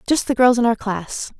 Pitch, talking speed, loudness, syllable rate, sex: 235 Hz, 260 wpm, -18 LUFS, 5.1 syllables/s, female